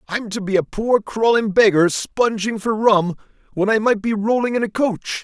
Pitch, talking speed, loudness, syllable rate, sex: 210 Hz, 205 wpm, -18 LUFS, 4.7 syllables/s, male